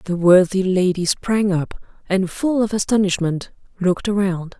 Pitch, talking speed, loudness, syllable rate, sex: 190 Hz, 145 wpm, -19 LUFS, 4.7 syllables/s, female